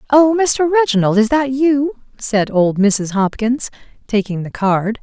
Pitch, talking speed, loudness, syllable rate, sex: 240 Hz, 155 wpm, -16 LUFS, 4.0 syllables/s, female